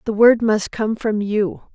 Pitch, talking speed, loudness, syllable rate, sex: 215 Hz, 205 wpm, -18 LUFS, 4.0 syllables/s, female